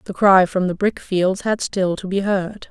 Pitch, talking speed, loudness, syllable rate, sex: 190 Hz, 220 wpm, -19 LUFS, 4.3 syllables/s, female